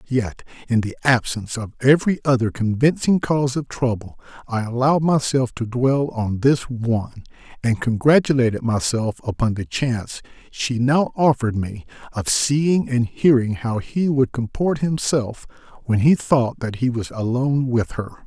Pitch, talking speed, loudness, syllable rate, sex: 125 Hz, 155 wpm, -20 LUFS, 4.8 syllables/s, male